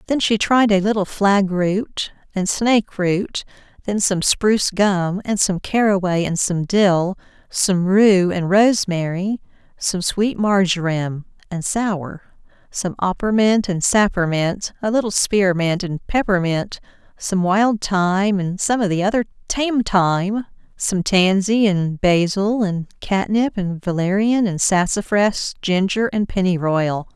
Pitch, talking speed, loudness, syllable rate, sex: 195 Hz, 130 wpm, -18 LUFS, 3.9 syllables/s, female